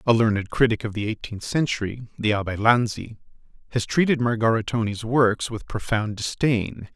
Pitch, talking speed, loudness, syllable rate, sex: 115 Hz, 145 wpm, -23 LUFS, 5.1 syllables/s, male